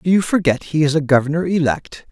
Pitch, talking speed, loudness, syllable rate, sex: 155 Hz, 225 wpm, -17 LUFS, 5.8 syllables/s, male